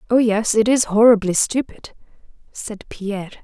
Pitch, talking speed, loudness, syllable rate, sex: 215 Hz, 140 wpm, -17 LUFS, 4.8 syllables/s, female